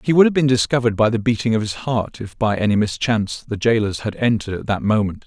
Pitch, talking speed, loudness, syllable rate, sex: 110 Hz, 250 wpm, -19 LUFS, 6.5 syllables/s, male